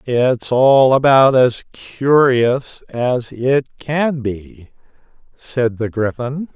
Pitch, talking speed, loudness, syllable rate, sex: 125 Hz, 110 wpm, -15 LUFS, 2.6 syllables/s, male